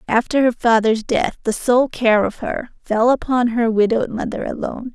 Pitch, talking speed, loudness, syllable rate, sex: 235 Hz, 180 wpm, -18 LUFS, 5.0 syllables/s, female